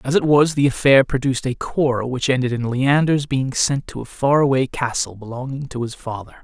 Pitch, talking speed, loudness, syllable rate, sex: 135 Hz, 215 wpm, -19 LUFS, 5.4 syllables/s, male